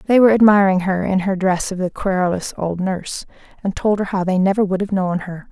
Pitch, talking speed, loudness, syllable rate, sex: 190 Hz, 240 wpm, -18 LUFS, 5.9 syllables/s, female